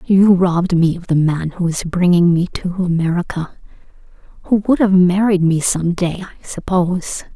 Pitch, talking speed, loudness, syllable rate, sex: 180 Hz, 165 wpm, -16 LUFS, 4.8 syllables/s, female